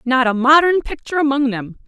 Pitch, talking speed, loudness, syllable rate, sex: 270 Hz, 190 wpm, -16 LUFS, 5.8 syllables/s, female